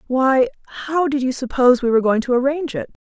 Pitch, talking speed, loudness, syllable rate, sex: 260 Hz, 220 wpm, -18 LUFS, 6.8 syllables/s, female